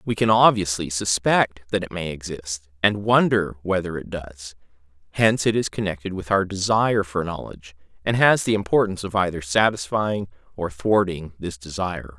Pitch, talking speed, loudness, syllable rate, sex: 95 Hz, 160 wpm, -22 LUFS, 5.2 syllables/s, male